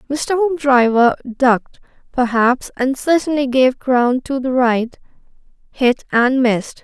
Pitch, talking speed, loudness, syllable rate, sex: 255 Hz, 125 wpm, -16 LUFS, 3.9 syllables/s, female